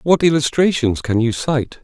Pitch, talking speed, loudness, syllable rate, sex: 135 Hz, 165 wpm, -17 LUFS, 4.6 syllables/s, male